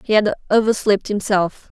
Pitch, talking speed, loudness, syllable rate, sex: 205 Hz, 135 wpm, -18 LUFS, 4.8 syllables/s, female